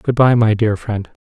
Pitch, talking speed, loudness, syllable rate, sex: 115 Hz, 245 wpm, -15 LUFS, 4.5 syllables/s, male